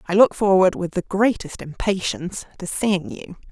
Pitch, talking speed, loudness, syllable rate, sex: 185 Hz, 170 wpm, -21 LUFS, 4.8 syllables/s, female